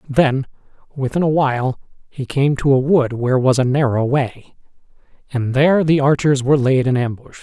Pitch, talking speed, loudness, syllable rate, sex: 135 Hz, 180 wpm, -17 LUFS, 5.2 syllables/s, male